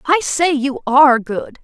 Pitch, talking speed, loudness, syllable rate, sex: 285 Hz, 185 wpm, -15 LUFS, 4.1 syllables/s, female